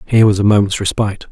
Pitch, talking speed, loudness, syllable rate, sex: 100 Hz, 230 wpm, -14 LUFS, 7.6 syllables/s, male